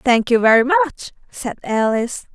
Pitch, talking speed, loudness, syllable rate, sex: 255 Hz, 155 wpm, -17 LUFS, 5.3 syllables/s, female